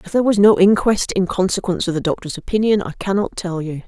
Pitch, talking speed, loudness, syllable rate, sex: 190 Hz, 230 wpm, -18 LUFS, 6.6 syllables/s, female